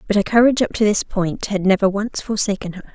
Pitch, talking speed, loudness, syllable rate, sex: 205 Hz, 245 wpm, -18 LUFS, 6.1 syllables/s, female